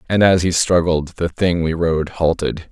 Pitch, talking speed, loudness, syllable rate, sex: 85 Hz, 200 wpm, -17 LUFS, 4.4 syllables/s, male